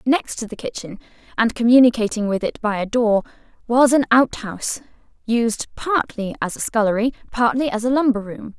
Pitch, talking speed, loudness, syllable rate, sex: 235 Hz, 170 wpm, -19 LUFS, 5.2 syllables/s, female